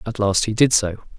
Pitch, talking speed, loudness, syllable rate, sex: 105 Hz, 255 wpm, -19 LUFS, 5.7 syllables/s, male